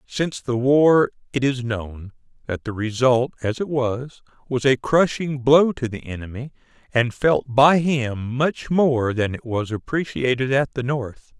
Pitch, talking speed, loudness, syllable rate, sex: 130 Hz, 170 wpm, -21 LUFS, 4.0 syllables/s, male